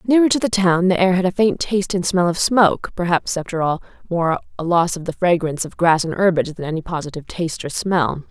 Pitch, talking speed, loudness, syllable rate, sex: 175 Hz, 240 wpm, -19 LUFS, 6.1 syllables/s, female